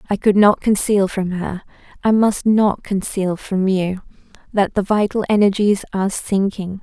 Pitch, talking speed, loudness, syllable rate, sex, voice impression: 200 Hz, 140 wpm, -18 LUFS, 4.4 syllables/s, female, very feminine, slightly adult-like, slightly soft, slightly calm, elegant, slightly sweet